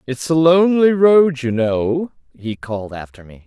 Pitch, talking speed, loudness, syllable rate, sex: 140 Hz, 175 wpm, -15 LUFS, 4.5 syllables/s, male